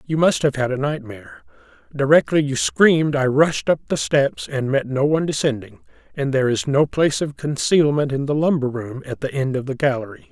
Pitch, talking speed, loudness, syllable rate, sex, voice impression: 140 Hz, 210 wpm, -19 LUFS, 5.6 syllables/s, male, masculine, middle-aged, thick, powerful, slightly weak, muffled, very raspy, mature, slightly friendly, unique, wild, lively, slightly strict, intense